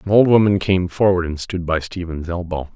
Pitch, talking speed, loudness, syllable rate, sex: 90 Hz, 220 wpm, -18 LUFS, 5.4 syllables/s, male